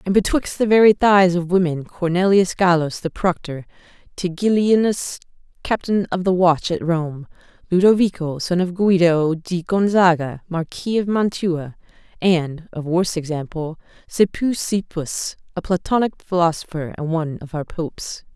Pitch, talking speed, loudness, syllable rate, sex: 175 Hz, 130 wpm, -19 LUFS, 4.3 syllables/s, female